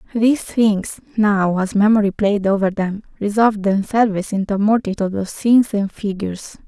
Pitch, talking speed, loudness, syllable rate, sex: 205 Hz, 155 wpm, -18 LUFS, 5.3 syllables/s, female